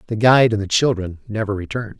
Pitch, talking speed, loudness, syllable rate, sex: 110 Hz, 210 wpm, -18 LUFS, 7.0 syllables/s, male